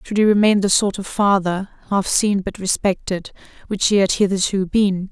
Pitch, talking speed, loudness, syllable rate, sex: 195 Hz, 190 wpm, -18 LUFS, 4.9 syllables/s, female